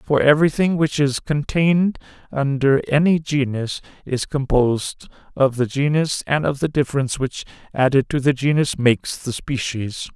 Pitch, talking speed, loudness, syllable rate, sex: 140 Hz, 150 wpm, -20 LUFS, 4.8 syllables/s, male